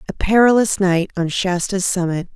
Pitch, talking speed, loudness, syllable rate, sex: 190 Hz, 155 wpm, -17 LUFS, 4.8 syllables/s, female